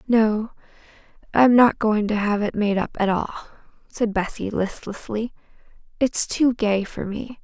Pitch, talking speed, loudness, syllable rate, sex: 215 Hz, 155 wpm, -22 LUFS, 4.0 syllables/s, female